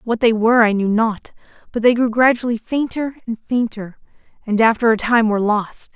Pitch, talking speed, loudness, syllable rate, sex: 225 Hz, 190 wpm, -17 LUFS, 5.3 syllables/s, female